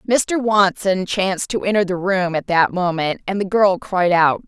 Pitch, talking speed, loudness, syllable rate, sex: 190 Hz, 200 wpm, -18 LUFS, 4.5 syllables/s, female